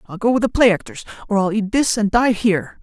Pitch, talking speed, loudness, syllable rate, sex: 215 Hz, 275 wpm, -17 LUFS, 6.1 syllables/s, female